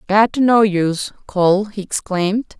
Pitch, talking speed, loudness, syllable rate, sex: 200 Hz, 160 wpm, -17 LUFS, 4.4 syllables/s, female